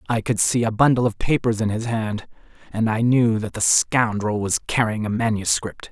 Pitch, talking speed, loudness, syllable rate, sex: 110 Hz, 205 wpm, -20 LUFS, 5.0 syllables/s, male